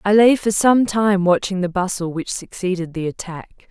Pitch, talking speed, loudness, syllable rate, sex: 190 Hz, 195 wpm, -18 LUFS, 4.7 syllables/s, female